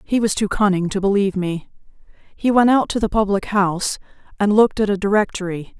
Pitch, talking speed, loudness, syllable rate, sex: 200 Hz, 195 wpm, -18 LUFS, 5.9 syllables/s, female